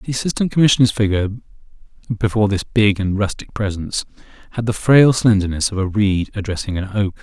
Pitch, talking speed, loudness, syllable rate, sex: 105 Hz, 165 wpm, -18 LUFS, 5.5 syllables/s, male